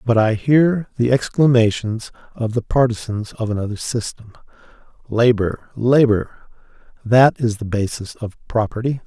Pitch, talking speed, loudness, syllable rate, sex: 115 Hz, 125 wpm, -18 LUFS, 4.6 syllables/s, male